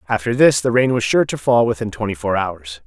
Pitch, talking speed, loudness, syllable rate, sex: 110 Hz, 250 wpm, -17 LUFS, 5.6 syllables/s, male